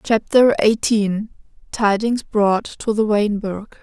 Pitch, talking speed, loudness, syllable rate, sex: 210 Hz, 110 wpm, -18 LUFS, 3.4 syllables/s, female